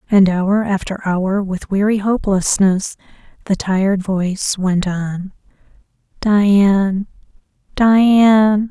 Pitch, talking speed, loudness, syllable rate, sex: 200 Hz, 90 wpm, -15 LUFS, 3.6 syllables/s, female